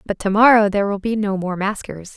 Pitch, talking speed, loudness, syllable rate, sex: 200 Hz, 250 wpm, -17 LUFS, 5.9 syllables/s, female